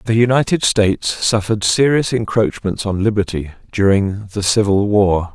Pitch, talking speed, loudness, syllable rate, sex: 105 Hz, 135 wpm, -16 LUFS, 4.8 syllables/s, male